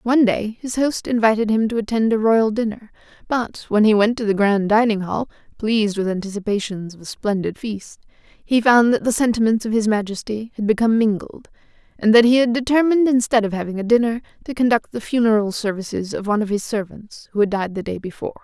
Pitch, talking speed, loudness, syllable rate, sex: 220 Hz, 210 wpm, -19 LUFS, 5.9 syllables/s, female